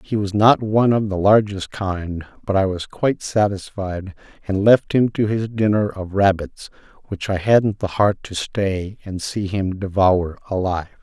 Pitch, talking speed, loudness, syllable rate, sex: 100 Hz, 180 wpm, -19 LUFS, 4.5 syllables/s, male